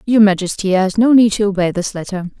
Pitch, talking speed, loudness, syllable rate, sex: 200 Hz, 225 wpm, -15 LUFS, 6.1 syllables/s, female